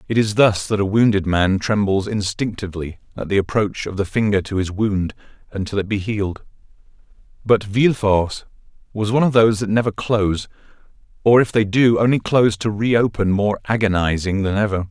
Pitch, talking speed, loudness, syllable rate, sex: 105 Hz, 175 wpm, -18 LUFS, 5.6 syllables/s, male